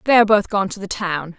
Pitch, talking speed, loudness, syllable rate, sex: 195 Hz, 260 wpm, -18 LUFS, 5.7 syllables/s, female